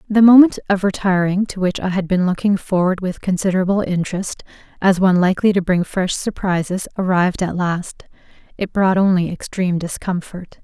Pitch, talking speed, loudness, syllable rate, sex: 185 Hz, 165 wpm, -17 LUFS, 5.5 syllables/s, female